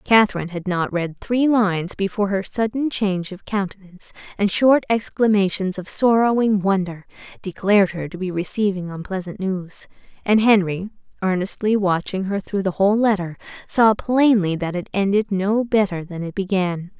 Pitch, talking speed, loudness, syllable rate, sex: 195 Hz, 155 wpm, -20 LUFS, 5.1 syllables/s, female